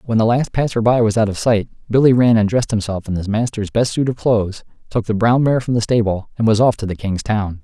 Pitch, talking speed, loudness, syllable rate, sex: 110 Hz, 275 wpm, -17 LUFS, 6.0 syllables/s, male